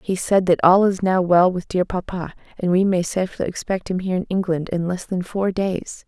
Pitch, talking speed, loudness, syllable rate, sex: 185 Hz, 235 wpm, -20 LUFS, 5.3 syllables/s, female